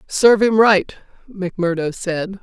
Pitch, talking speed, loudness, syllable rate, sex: 190 Hz, 125 wpm, -17 LUFS, 4.1 syllables/s, female